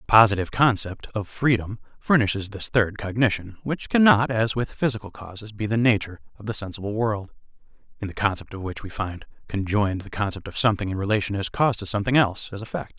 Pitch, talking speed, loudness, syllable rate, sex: 105 Hz, 200 wpm, -24 LUFS, 3.6 syllables/s, male